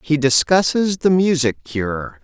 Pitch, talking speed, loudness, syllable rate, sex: 145 Hz, 135 wpm, -17 LUFS, 3.8 syllables/s, male